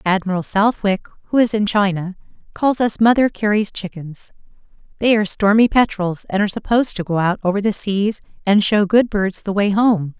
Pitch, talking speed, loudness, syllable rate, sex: 205 Hz, 185 wpm, -17 LUFS, 5.3 syllables/s, female